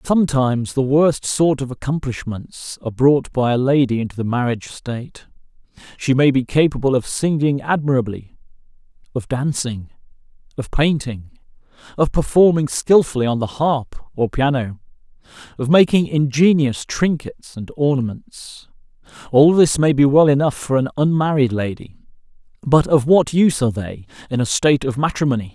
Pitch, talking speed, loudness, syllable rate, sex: 135 Hz, 145 wpm, -18 LUFS, 5.0 syllables/s, male